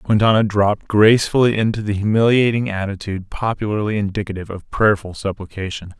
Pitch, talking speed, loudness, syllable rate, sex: 105 Hz, 120 wpm, -18 LUFS, 6.1 syllables/s, male